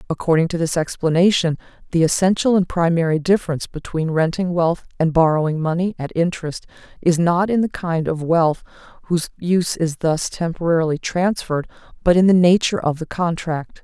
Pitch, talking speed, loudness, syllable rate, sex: 170 Hz, 160 wpm, -19 LUFS, 5.6 syllables/s, female